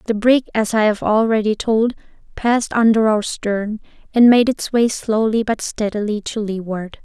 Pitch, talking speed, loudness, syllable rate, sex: 220 Hz, 170 wpm, -17 LUFS, 4.6 syllables/s, female